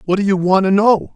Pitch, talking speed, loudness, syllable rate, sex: 195 Hz, 315 wpm, -14 LUFS, 6.0 syllables/s, male